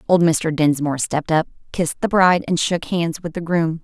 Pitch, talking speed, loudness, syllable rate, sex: 165 Hz, 220 wpm, -19 LUFS, 5.6 syllables/s, female